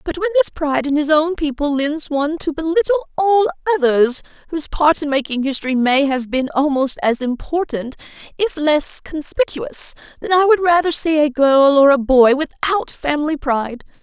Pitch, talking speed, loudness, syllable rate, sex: 300 Hz, 170 wpm, -17 LUFS, 5.2 syllables/s, female